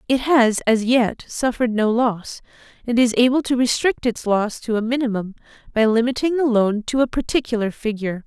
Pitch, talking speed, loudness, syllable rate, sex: 235 Hz, 180 wpm, -19 LUFS, 5.3 syllables/s, female